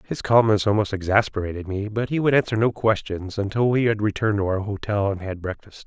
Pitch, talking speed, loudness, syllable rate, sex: 105 Hz, 215 wpm, -22 LUFS, 6.0 syllables/s, male